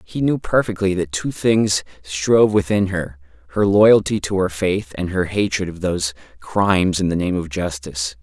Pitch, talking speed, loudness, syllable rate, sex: 95 Hz, 180 wpm, -19 LUFS, 4.8 syllables/s, male